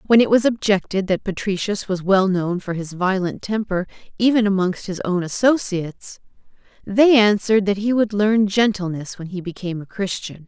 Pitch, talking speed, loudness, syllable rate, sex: 195 Hz, 170 wpm, -19 LUFS, 5.2 syllables/s, female